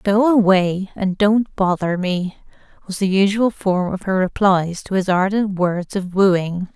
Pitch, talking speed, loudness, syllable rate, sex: 190 Hz, 170 wpm, -18 LUFS, 4.0 syllables/s, female